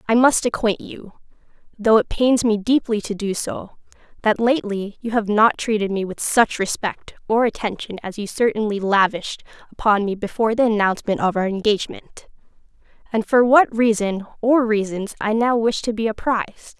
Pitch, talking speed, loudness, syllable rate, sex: 220 Hz, 170 wpm, -20 LUFS, 5.3 syllables/s, female